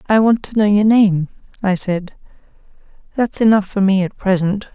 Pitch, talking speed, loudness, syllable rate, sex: 200 Hz, 175 wpm, -16 LUFS, 4.9 syllables/s, female